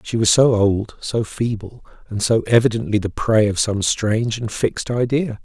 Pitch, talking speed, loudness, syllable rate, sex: 110 Hz, 190 wpm, -19 LUFS, 4.8 syllables/s, male